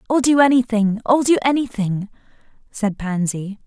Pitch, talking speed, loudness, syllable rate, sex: 225 Hz, 115 wpm, -18 LUFS, 4.8 syllables/s, female